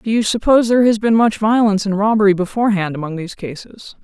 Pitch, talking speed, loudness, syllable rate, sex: 210 Hz, 210 wpm, -15 LUFS, 6.8 syllables/s, female